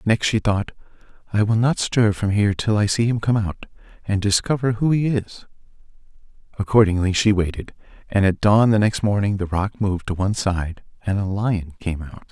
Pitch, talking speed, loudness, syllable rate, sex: 105 Hz, 195 wpm, -20 LUFS, 5.3 syllables/s, male